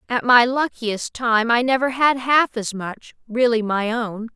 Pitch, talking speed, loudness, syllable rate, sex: 235 Hz, 180 wpm, -19 LUFS, 4.0 syllables/s, female